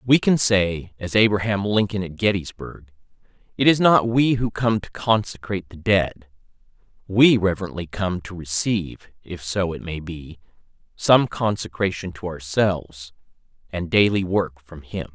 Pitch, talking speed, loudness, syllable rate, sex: 95 Hz, 145 wpm, -21 LUFS, 4.5 syllables/s, male